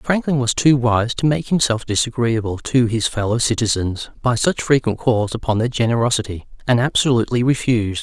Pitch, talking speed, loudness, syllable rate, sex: 120 Hz, 165 wpm, -18 LUFS, 5.5 syllables/s, male